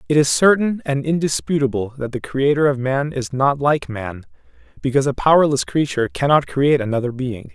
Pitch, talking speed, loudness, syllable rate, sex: 140 Hz, 175 wpm, -18 LUFS, 5.7 syllables/s, male